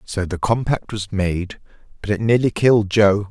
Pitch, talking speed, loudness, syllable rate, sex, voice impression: 105 Hz, 180 wpm, -19 LUFS, 4.7 syllables/s, male, very masculine, very middle-aged, very thick, tensed, slightly powerful, bright, soft, muffled, fluent, slightly raspy, very cool, intellectual, sincere, very calm, very mature, friendly, very reassuring, very unique, slightly elegant, very wild, slightly sweet, lively, kind, slightly intense, slightly modest